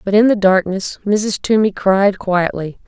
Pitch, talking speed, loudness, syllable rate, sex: 195 Hz, 165 wpm, -15 LUFS, 4.2 syllables/s, female